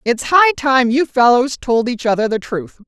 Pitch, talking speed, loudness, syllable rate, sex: 250 Hz, 210 wpm, -15 LUFS, 4.8 syllables/s, female